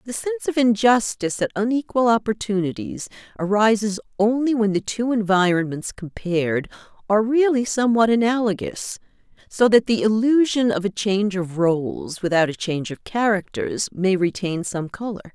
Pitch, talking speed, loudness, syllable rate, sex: 210 Hz, 140 wpm, -21 LUFS, 5.3 syllables/s, female